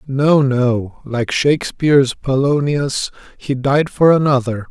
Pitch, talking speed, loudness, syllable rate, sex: 135 Hz, 115 wpm, -16 LUFS, 3.8 syllables/s, male